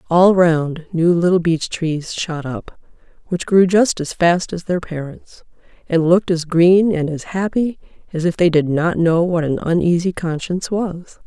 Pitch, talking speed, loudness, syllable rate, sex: 170 Hz, 180 wpm, -17 LUFS, 4.3 syllables/s, female